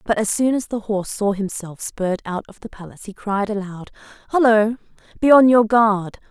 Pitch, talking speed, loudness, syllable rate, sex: 210 Hz, 200 wpm, -19 LUFS, 5.4 syllables/s, female